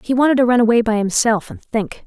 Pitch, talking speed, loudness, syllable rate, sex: 230 Hz, 260 wpm, -16 LUFS, 6.1 syllables/s, female